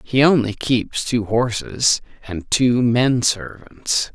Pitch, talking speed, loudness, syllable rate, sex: 115 Hz, 130 wpm, -18 LUFS, 3.2 syllables/s, male